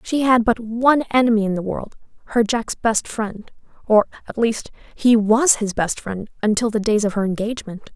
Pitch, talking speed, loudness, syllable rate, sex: 220 Hz, 195 wpm, -19 LUFS, 5.0 syllables/s, female